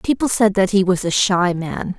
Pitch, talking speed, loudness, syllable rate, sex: 190 Hz, 240 wpm, -17 LUFS, 4.8 syllables/s, female